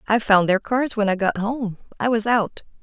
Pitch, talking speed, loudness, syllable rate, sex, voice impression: 215 Hz, 235 wpm, -21 LUFS, 4.7 syllables/s, female, very feminine, adult-like, slightly calm, elegant, slightly kind